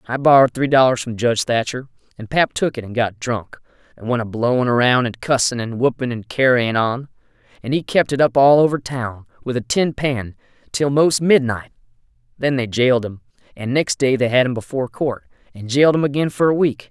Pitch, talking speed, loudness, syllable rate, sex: 125 Hz, 215 wpm, -18 LUFS, 5.6 syllables/s, male